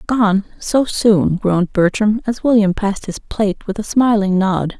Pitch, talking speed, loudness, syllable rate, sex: 205 Hz, 175 wpm, -16 LUFS, 4.5 syllables/s, female